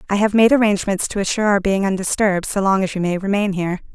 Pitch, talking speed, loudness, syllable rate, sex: 195 Hz, 245 wpm, -18 LUFS, 7.1 syllables/s, female